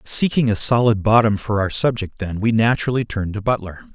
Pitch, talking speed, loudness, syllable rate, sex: 110 Hz, 215 wpm, -19 LUFS, 5.8 syllables/s, male